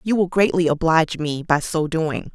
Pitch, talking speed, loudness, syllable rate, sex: 165 Hz, 205 wpm, -20 LUFS, 5.0 syllables/s, female